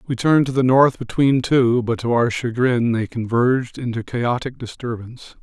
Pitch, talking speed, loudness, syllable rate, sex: 120 Hz, 175 wpm, -19 LUFS, 5.0 syllables/s, male